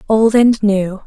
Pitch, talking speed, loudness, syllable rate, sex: 210 Hz, 170 wpm, -13 LUFS, 3.5 syllables/s, female